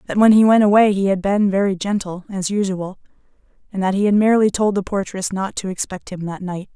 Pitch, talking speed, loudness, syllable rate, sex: 195 Hz, 230 wpm, -18 LUFS, 5.9 syllables/s, female